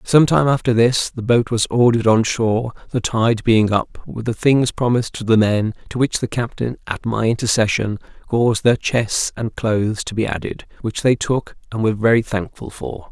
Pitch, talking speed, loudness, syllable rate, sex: 115 Hz, 200 wpm, -18 LUFS, 5.1 syllables/s, male